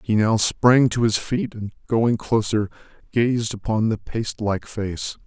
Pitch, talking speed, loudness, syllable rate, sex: 110 Hz, 160 wpm, -21 LUFS, 4.2 syllables/s, male